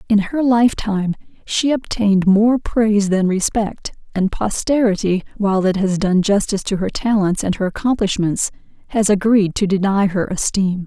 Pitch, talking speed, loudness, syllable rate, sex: 205 Hz, 160 wpm, -17 LUFS, 4.8 syllables/s, female